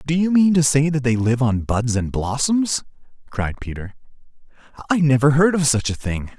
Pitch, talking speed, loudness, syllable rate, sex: 135 Hz, 195 wpm, -19 LUFS, 5.0 syllables/s, male